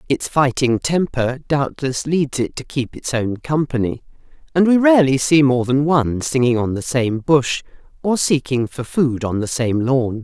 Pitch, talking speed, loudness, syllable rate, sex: 135 Hz, 180 wpm, -18 LUFS, 4.5 syllables/s, female